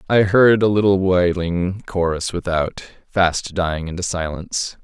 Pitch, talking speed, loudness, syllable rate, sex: 90 Hz, 135 wpm, -19 LUFS, 4.2 syllables/s, male